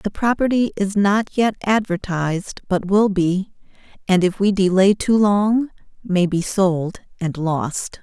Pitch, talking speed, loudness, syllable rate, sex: 195 Hz, 150 wpm, -19 LUFS, 2.4 syllables/s, female